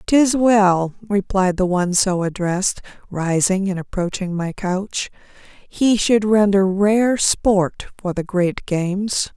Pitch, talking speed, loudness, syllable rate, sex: 195 Hz, 135 wpm, -18 LUFS, 3.7 syllables/s, female